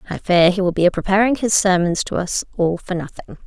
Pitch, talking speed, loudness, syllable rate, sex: 185 Hz, 245 wpm, -18 LUFS, 5.8 syllables/s, female